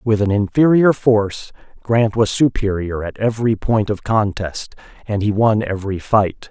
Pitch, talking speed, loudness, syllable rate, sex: 105 Hz, 155 wpm, -17 LUFS, 4.7 syllables/s, male